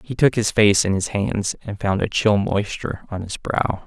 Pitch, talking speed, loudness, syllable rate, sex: 105 Hz, 235 wpm, -20 LUFS, 4.7 syllables/s, male